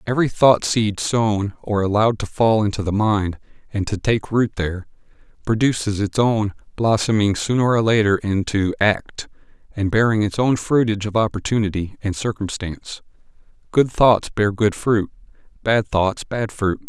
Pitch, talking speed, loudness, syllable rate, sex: 105 Hz, 155 wpm, -19 LUFS, 4.8 syllables/s, male